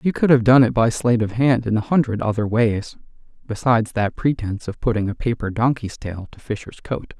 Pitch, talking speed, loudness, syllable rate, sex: 115 Hz, 215 wpm, -20 LUFS, 5.5 syllables/s, male